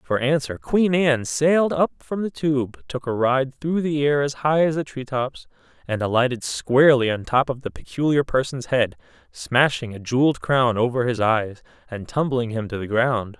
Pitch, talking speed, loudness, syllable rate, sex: 135 Hz, 195 wpm, -21 LUFS, 4.8 syllables/s, male